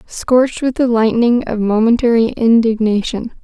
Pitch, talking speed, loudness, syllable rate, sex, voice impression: 230 Hz, 120 wpm, -14 LUFS, 4.7 syllables/s, female, feminine, slightly young, slightly weak, soft, calm, kind, modest